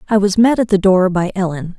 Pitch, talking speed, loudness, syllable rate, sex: 195 Hz, 270 wpm, -14 LUFS, 5.8 syllables/s, female